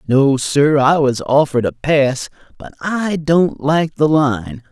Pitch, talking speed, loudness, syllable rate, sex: 145 Hz, 165 wpm, -15 LUFS, 3.6 syllables/s, male